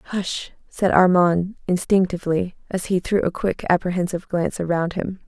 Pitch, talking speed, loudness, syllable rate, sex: 180 Hz, 150 wpm, -21 LUFS, 5.2 syllables/s, female